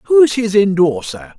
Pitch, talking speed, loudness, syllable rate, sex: 155 Hz, 130 wpm, -13 LUFS, 4.3 syllables/s, male